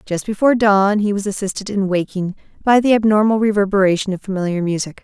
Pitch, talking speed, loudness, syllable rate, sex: 200 Hz, 180 wpm, -17 LUFS, 6.2 syllables/s, female